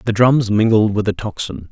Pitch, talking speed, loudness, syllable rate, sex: 105 Hz, 210 wpm, -16 LUFS, 4.8 syllables/s, male